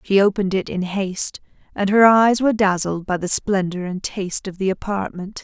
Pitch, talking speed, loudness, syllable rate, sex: 195 Hz, 200 wpm, -19 LUFS, 5.4 syllables/s, female